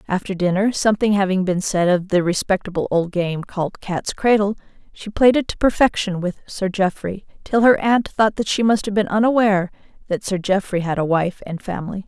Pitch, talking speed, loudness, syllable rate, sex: 195 Hz, 195 wpm, -19 LUFS, 5.4 syllables/s, female